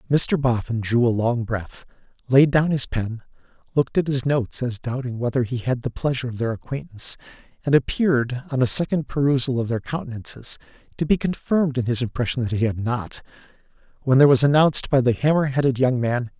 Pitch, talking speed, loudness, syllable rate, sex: 130 Hz, 195 wpm, -22 LUFS, 6.0 syllables/s, male